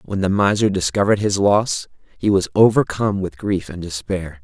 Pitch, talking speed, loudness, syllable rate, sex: 100 Hz, 175 wpm, -19 LUFS, 5.1 syllables/s, male